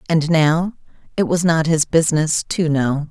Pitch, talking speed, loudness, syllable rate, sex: 160 Hz, 175 wpm, -17 LUFS, 4.4 syllables/s, female